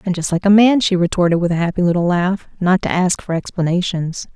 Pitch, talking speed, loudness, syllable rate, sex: 180 Hz, 235 wpm, -16 LUFS, 5.9 syllables/s, female